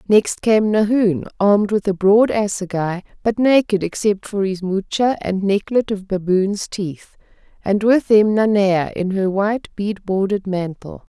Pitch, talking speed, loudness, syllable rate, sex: 200 Hz, 155 wpm, -18 LUFS, 4.3 syllables/s, female